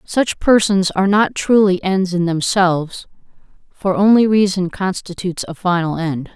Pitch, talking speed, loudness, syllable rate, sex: 190 Hz, 140 wpm, -16 LUFS, 4.7 syllables/s, female